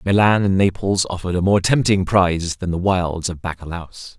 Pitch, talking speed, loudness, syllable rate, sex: 90 Hz, 185 wpm, -18 LUFS, 5.2 syllables/s, male